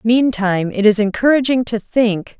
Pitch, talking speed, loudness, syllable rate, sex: 225 Hz, 150 wpm, -16 LUFS, 4.8 syllables/s, female